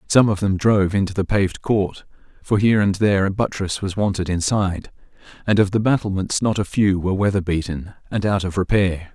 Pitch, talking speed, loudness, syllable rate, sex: 100 Hz, 205 wpm, -20 LUFS, 5.8 syllables/s, male